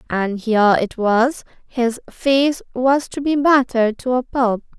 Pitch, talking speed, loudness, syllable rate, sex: 245 Hz, 165 wpm, -18 LUFS, 4.0 syllables/s, female